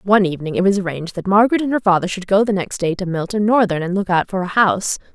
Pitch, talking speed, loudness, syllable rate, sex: 190 Hz, 280 wpm, -18 LUFS, 7.1 syllables/s, female